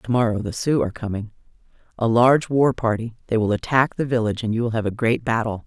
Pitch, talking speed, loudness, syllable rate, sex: 115 Hz, 210 wpm, -21 LUFS, 6.4 syllables/s, female